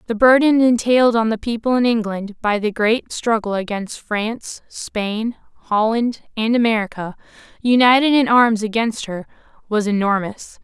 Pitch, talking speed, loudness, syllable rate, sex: 225 Hz, 140 wpm, -18 LUFS, 4.6 syllables/s, female